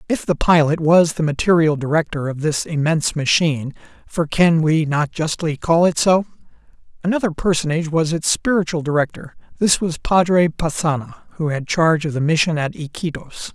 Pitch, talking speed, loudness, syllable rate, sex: 160 Hz, 155 wpm, -18 LUFS, 5.3 syllables/s, male